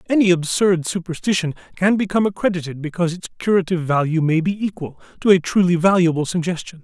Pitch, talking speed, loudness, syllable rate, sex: 175 Hz, 160 wpm, -19 LUFS, 6.5 syllables/s, male